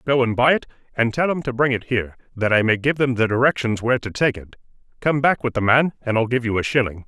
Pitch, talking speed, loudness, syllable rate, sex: 120 Hz, 280 wpm, -20 LUFS, 6.4 syllables/s, male